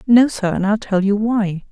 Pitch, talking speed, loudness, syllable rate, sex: 210 Hz, 245 wpm, -17 LUFS, 4.6 syllables/s, female